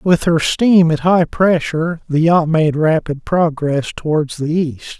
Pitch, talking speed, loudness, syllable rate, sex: 160 Hz, 170 wpm, -15 LUFS, 4.0 syllables/s, male